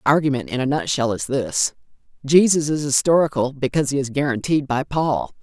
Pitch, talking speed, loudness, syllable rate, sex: 145 Hz, 175 wpm, -20 LUFS, 5.7 syllables/s, female